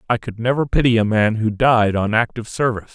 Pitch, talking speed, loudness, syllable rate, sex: 115 Hz, 225 wpm, -18 LUFS, 6.2 syllables/s, male